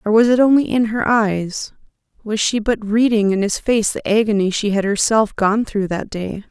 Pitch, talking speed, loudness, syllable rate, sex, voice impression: 215 Hz, 205 wpm, -17 LUFS, 4.8 syllables/s, female, feminine, middle-aged, tensed, powerful, muffled, raspy, intellectual, calm, friendly, reassuring, elegant, kind, modest